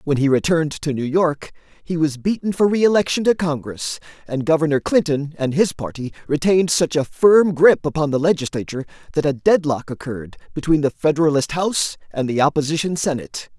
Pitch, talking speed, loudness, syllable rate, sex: 155 Hz, 170 wpm, -19 LUFS, 5.7 syllables/s, male